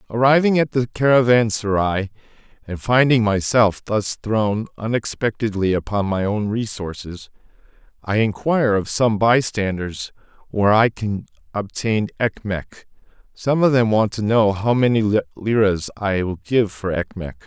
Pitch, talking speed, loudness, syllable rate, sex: 110 Hz, 130 wpm, -19 LUFS, 4.8 syllables/s, male